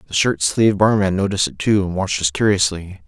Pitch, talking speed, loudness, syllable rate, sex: 95 Hz, 215 wpm, -17 LUFS, 6.3 syllables/s, male